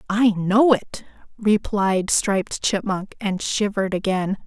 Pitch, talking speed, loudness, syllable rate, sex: 200 Hz, 120 wpm, -21 LUFS, 3.9 syllables/s, female